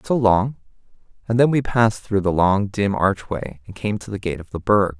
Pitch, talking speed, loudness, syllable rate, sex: 100 Hz, 230 wpm, -20 LUFS, 5.1 syllables/s, male